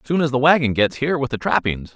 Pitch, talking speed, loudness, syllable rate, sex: 130 Hz, 275 wpm, -19 LUFS, 6.5 syllables/s, male